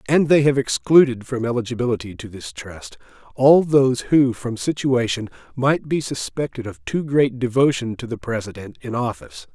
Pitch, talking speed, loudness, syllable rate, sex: 125 Hz, 165 wpm, -20 LUFS, 5.1 syllables/s, male